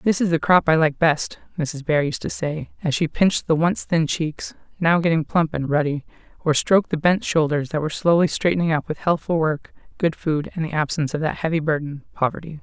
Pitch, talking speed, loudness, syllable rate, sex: 160 Hz, 225 wpm, -21 LUFS, 5.6 syllables/s, female